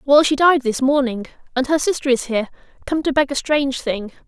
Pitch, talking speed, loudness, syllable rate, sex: 270 Hz, 210 wpm, -18 LUFS, 6.0 syllables/s, female